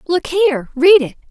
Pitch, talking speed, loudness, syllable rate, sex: 325 Hz, 185 wpm, -14 LUFS, 5.0 syllables/s, female